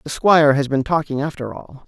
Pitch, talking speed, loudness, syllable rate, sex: 140 Hz, 225 wpm, -17 LUFS, 5.7 syllables/s, male